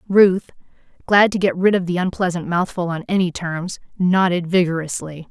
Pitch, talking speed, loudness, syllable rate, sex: 180 Hz, 160 wpm, -19 LUFS, 5.0 syllables/s, female